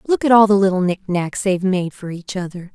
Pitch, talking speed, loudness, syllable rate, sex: 190 Hz, 260 wpm, -17 LUFS, 5.9 syllables/s, female